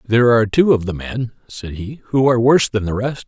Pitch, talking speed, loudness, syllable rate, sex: 115 Hz, 255 wpm, -16 LUFS, 5.9 syllables/s, male